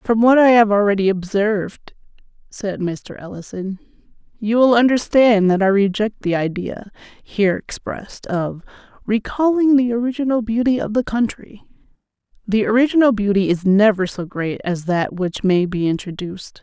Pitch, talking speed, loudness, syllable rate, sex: 210 Hz, 145 wpm, -18 LUFS, 4.9 syllables/s, female